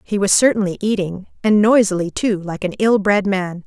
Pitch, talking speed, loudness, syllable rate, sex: 200 Hz, 195 wpm, -17 LUFS, 5.1 syllables/s, female